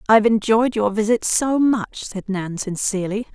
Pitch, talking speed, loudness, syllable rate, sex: 215 Hz, 160 wpm, -20 LUFS, 4.8 syllables/s, female